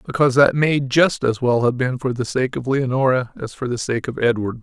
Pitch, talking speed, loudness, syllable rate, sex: 130 Hz, 245 wpm, -19 LUFS, 5.5 syllables/s, male